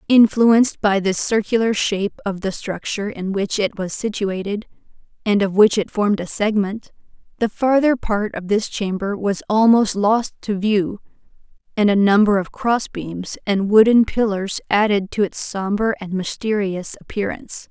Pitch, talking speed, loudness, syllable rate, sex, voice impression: 205 Hz, 160 wpm, -19 LUFS, 4.6 syllables/s, female, feminine, adult-like, tensed, powerful, slightly clear, slightly raspy, intellectual, calm, elegant, lively, slightly strict, slightly sharp